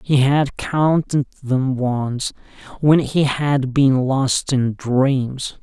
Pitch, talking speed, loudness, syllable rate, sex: 135 Hz, 130 wpm, -18 LUFS, 2.7 syllables/s, male